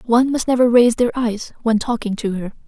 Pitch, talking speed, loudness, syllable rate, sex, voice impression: 235 Hz, 225 wpm, -18 LUFS, 5.8 syllables/s, female, very feminine, slightly adult-like, slightly cute, slightly calm, friendly, slightly kind